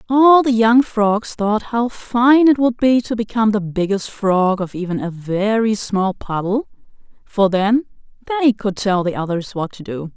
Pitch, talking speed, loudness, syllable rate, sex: 215 Hz, 185 wpm, -17 LUFS, 4.3 syllables/s, female